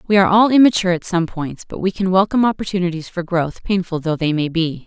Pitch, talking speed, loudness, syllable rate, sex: 180 Hz, 235 wpm, -17 LUFS, 6.4 syllables/s, female